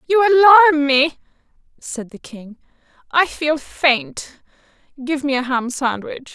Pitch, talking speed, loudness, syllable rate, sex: 285 Hz, 125 wpm, -16 LUFS, 3.8 syllables/s, female